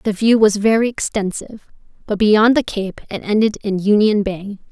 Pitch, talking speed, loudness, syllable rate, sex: 210 Hz, 180 wpm, -16 LUFS, 5.0 syllables/s, female